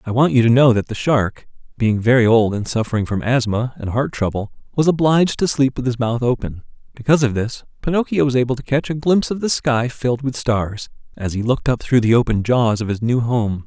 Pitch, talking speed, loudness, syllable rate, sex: 125 Hz, 235 wpm, -18 LUFS, 5.8 syllables/s, male